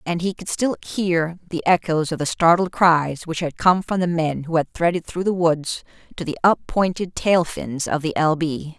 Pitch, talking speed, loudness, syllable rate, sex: 170 Hz, 225 wpm, -21 LUFS, 4.7 syllables/s, female